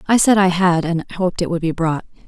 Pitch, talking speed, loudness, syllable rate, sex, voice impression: 175 Hz, 265 wpm, -17 LUFS, 6.1 syllables/s, female, feminine, adult-like, tensed, slightly powerful, slightly bright, clear, fluent, intellectual, calm, elegant, lively, slightly sharp